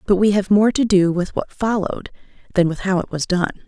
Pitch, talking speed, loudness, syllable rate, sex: 195 Hz, 245 wpm, -19 LUFS, 5.7 syllables/s, female